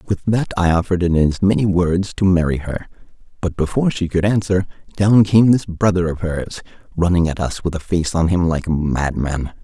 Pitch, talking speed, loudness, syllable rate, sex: 90 Hz, 205 wpm, -18 LUFS, 5.2 syllables/s, male